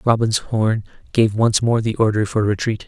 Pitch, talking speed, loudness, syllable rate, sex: 110 Hz, 190 wpm, -19 LUFS, 4.8 syllables/s, male